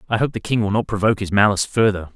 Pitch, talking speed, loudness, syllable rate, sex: 105 Hz, 280 wpm, -19 LUFS, 7.7 syllables/s, male